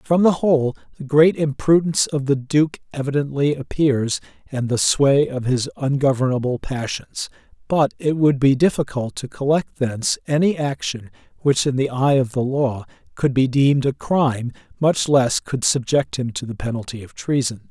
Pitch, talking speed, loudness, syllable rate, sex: 135 Hz, 170 wpm, -20 LUFS, 4.8 syllables/s, male